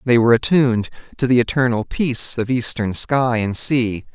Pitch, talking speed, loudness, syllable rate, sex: 120 Hz, 175 wpm, -18 LUFS, 5.1 syllables/s, male